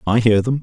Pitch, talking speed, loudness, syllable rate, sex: 115 Hz, 290 wpm, -16 LUFS, 6.1 syllables/s, male